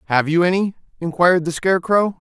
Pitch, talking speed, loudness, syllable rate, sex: 175 Hz, 160 wpm, -18 LUFS, 6.3 syllables/s, male